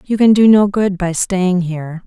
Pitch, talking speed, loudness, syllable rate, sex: 190 Hz, 235 wpm, -14 LUFS, 4.6 syllables/s, female